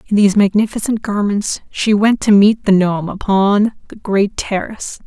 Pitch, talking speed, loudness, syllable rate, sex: 205 Hz, 165 wpm, -15 LUFS, 5.0 syllables/s, female